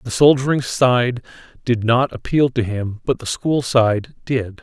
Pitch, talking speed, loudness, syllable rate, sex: 125 Hz, 170 wpm, -18 LUFS, 4.1 syllables/s, male